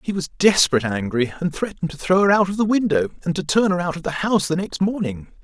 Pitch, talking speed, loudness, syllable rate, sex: 175 Hz, 265 wpm, -20 LUFS, 6.7 syllables/s, male